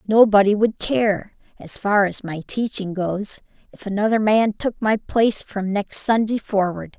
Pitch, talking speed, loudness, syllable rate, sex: 205 Hz, 165 wpm, -20 LUFS, 4.3 syllables/s, female